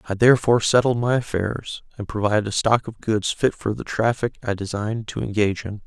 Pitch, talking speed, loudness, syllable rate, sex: 110 Hz, 205 wpm, -22 LUFS, 5.9 syllables/s, male